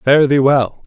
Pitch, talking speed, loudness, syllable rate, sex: 135 Hz, 210 wpm, -13 LUFS, 3.6 syllables/s, male